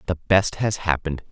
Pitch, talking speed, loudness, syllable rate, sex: 90 Hz, 185 wpm, -22 LUFS, 5.5 syllables/s, male